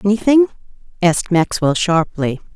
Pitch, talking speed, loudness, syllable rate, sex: 190 Hz, 95 wpm, -16 LUFS, 5.0 syllables/s, female